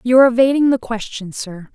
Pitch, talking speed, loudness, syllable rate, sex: 240 Hz, 205 wpm, -16 LUFS, 6.1 syllables/s, female